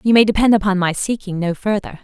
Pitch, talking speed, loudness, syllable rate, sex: 200 Hz, 235 wpm, -17 LUFS, 6.2 syllables/s, female